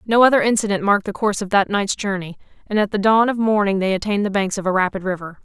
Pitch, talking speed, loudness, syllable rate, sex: 200 Hz, 265 wpm, -19 LUFS, 6.9 syllables/s, female